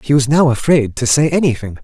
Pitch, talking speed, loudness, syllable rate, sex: 135 Hz, 230 wpm, -14 LUFS, 5.9 syllables/s, male